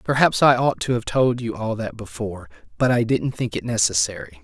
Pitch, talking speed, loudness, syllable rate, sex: 115 Hz, 205 wpm, -21 LUFS, 5.5 syllables/s, male